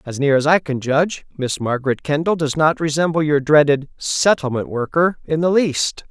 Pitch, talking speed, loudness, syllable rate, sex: 150 Hz, 185 wpm, -18 LUFS, 5.1 syllables/s, male